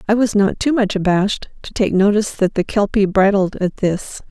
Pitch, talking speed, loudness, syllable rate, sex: 200 Hz, 210 wpm, -17 LUFS, 5.3 syllables/s, female